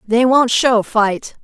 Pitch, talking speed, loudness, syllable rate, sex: 230 Hz, 170 wpm, -14 LUFS, 3.2 syllables/s, female